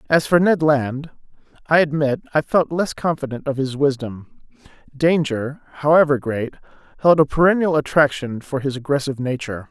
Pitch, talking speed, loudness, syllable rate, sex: 145 Hz, 150 wpm, -19 LUFS, 5.2 syllables/s, male